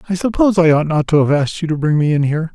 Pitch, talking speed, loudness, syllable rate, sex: 160 Hz, 330 wpm, -15 LUFS, 7.6 syllables/s, male